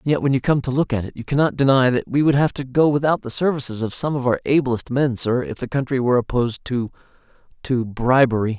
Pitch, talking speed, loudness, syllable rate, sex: 130 Hz, 240 wpm, -20 LUFS, 6.3 syllables/s, male